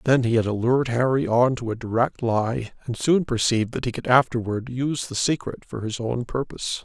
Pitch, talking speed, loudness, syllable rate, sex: 120 Hz, 210 wpm, -23 LUFS, 5.5 syllables/s, male